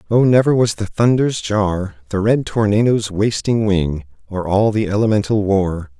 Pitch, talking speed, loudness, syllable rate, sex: 105 Hz, 160 wpm, -17 LUFS, 4.5 syllables/s, male